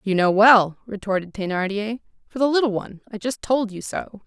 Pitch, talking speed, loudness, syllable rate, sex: 215 Hz, 195 wpm, -21 LUFS, 5.4 syllables/s, female